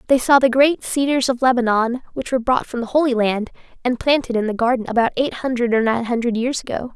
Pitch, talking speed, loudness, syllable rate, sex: 245 Hz, 235 wpm, -19 LUFS, 6.1 syllables/s, female